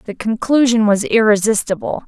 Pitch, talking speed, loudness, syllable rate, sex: 220 Hz, 115 wpm, -15 LUFS, 5.3 syllables/s, female